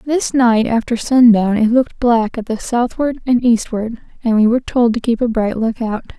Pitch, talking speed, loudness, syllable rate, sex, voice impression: 235 Hz, 215 wpm, -15 LUFS, 4.8 syllables/s, female, very feminine, young, slightly adult-like, very thin, very relaxed, very weak, dark, very soft, clear, fluent, slightly raspy, very cute, very intellectual, refreshing, sincere, very calm, very friendly, very reassuring, unique, very elegant, sweet, very kind, very modest